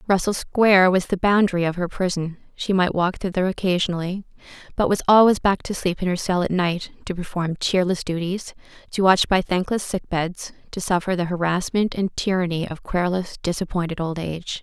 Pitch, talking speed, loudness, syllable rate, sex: 180 Hz, 185 wpm, -22 LUFS, 5.5 syllables/s, female